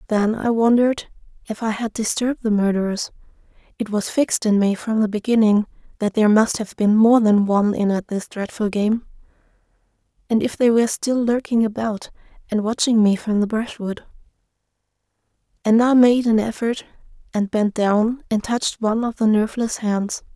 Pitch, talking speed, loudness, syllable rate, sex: 220 Hz, 165 wpm, -19 LUFS, 5.3 syllables/s, female